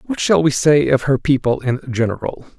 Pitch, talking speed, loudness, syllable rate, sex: 135 Hz, 210 wpm, -17 LUFS, 5.3 syllables/s, male